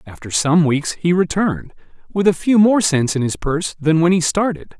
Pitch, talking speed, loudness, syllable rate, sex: 165 Hz, 215 wpm, -17 LUFS, 5.1 syllables/s, male